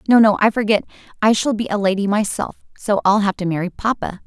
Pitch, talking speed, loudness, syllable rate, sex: 205 Hz, 225 wpm, -18 LUFS, 6.1 syllables/s, female